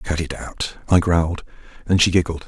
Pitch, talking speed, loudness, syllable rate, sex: 85 Hz, 195 wpm, -20 LUFS, 5.1 syllables/s, male